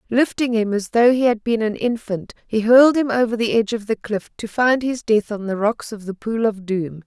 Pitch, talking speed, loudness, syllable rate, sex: 225 Hz, 255 wpm, -19 LUFS, 5.3 syllables/s, female